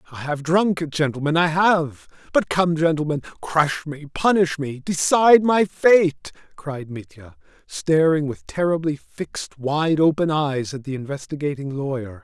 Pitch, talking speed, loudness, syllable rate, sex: 155 Hz, 145 wpm, -21 LUFS, 4.4 syllables/s, male